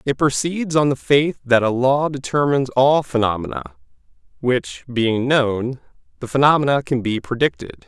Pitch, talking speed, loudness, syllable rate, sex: 125 Hz, 145 wpm, -19 LUFS, 4.7 syllables/s, male